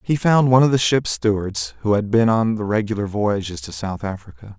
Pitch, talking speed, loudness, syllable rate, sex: 105 Hz, 220 wpm, -19 LUFS, 5.5 syllables/s, male